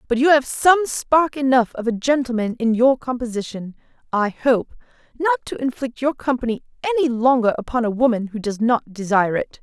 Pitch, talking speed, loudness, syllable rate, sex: 245 Hz, 180 wpm, -20 LUFS, 5.4 syllables/s, female